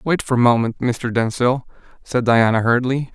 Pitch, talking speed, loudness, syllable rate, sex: 120 Hz, 170 wpm, -18 LUFS, 5.2 syllables/s, male